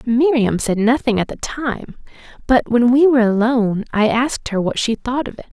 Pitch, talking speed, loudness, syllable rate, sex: 240 Hz, 205 wpm, -17 LUFS, 5.2 syllables/s, female